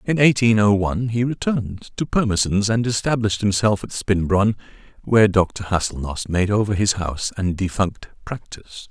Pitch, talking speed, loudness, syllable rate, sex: 105 Hz, 155 wpm, -20 LUFS, 5.2 syllables/s, male